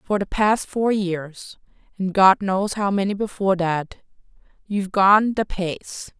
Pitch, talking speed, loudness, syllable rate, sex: 195 Hz, 155 wpm, -20 LUFS, 4.0 syllables/s, female